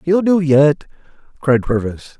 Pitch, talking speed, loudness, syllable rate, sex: 145 Hz, 135 wpm, -15 LUFS, 3.9 syllables/s, male